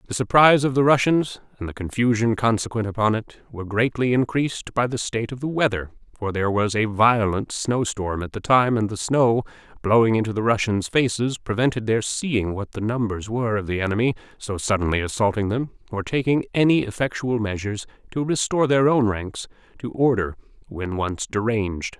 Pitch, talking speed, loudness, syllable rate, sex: 115 Hz, 185 wpm, -22 LUFS, 5.5 syllables/s, male